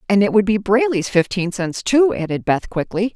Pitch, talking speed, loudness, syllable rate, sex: 205 Hz, 210 wpm, -18 LUFS, 5.1 syllables/s, female